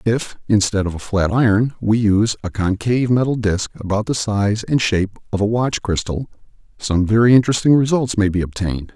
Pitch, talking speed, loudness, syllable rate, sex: 110 Hz, 190 wpm, -18 LUFS, 5.6 syllables/s, male